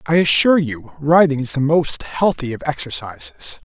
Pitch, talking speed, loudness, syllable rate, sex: 150 Hz, 160 wpm, -17 LUFS, 5.0 syllables/s, male